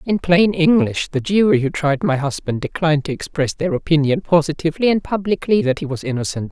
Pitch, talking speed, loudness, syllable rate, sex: 165 Hz, 195 wpm, -18 LUFS, 5.7 syllables/s, female